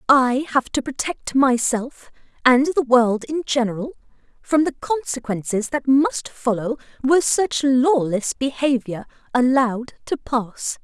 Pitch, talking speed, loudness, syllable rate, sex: 255 Hz, 125 wpm, -20 LUFS, 4.1 syllables/s, female